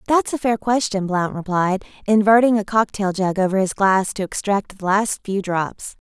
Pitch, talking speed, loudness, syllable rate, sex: 205 Hz, 190 wpm, -19 LUFS, 4.7 syllables/s, female